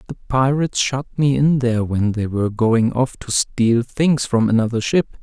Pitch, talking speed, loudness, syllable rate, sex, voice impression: 125 Hz, 195 wpm, -18 LUFS, 4.7 syllables/s, male, masculine, adult-like, tensed, powerful, hard, slightly muffled, cool, calm, mature, slightly friendly, reassuring, slightly unique, wild, strict